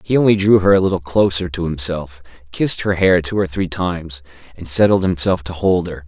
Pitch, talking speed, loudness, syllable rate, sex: 90 Hz, 215 wpm, -17 LUFS, 5.6 syllables/s, male